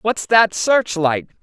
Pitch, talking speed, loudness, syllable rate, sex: 205 Hz, 125 wpm, -16 LUFS, 3.1 syllables/s, female